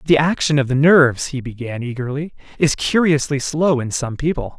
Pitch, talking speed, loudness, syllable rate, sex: 145 Hz, 185 wpm, -18 LUFS, 5.2 syllables/s, male